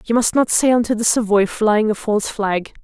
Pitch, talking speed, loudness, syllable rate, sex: 220 Hz, 235 wpm, -17 LUFS, 5.3 syllables/s, female